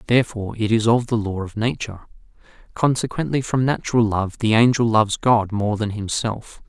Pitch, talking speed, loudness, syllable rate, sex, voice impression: 110 Hz, 170 wpm, -20 LUFS, 5.5 syllables/s, male, very masculine, middle-aged, slightly thick, slightly relaxed, slightly powerful, dark, soft, slightly muffled, fluent, cool, very intellectual, refreshing, sincere, very calm, mature, friendly, reassuring, unique, elegant, sweet, kind, modest